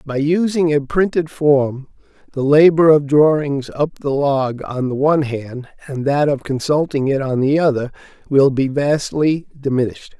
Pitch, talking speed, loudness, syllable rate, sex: 145 Hz, 165 wpm, -17 LUFS, 4.5 syllables/s, male